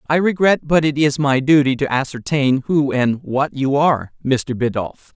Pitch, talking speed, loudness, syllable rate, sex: 140 Hz, 185 wpm, -17 LUFS, 4.7 syllables/s, male